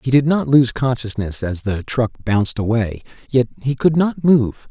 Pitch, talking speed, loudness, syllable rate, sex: 120 Hz, 190 wpm, -18 LUFS, 4.7 syllables/s, male